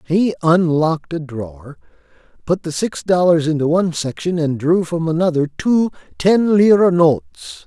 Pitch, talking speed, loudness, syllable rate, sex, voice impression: 165 Hz, 150 wpm, -16 LUFS, 5.0 syllables/s, male, masculine, old, powerful, slightly bright, muffled, raspy, mature, wild, lively, slightly strict, slightly intense